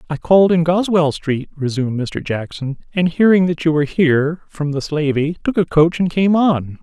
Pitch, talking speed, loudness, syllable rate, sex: 160 Hz, 200 wpm, -17 LUFS, 5.1 syllables/s, male